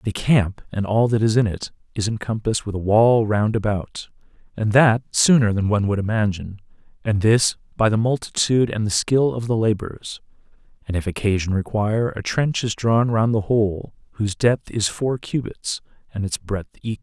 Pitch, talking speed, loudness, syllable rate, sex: 110 Hz, 185 wpm, -20 LUFS, 5.2 syllables/s, male